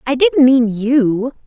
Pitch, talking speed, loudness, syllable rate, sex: 245 Hz, 165 wpm, -13 LUFS, 3.2 syllables/s, female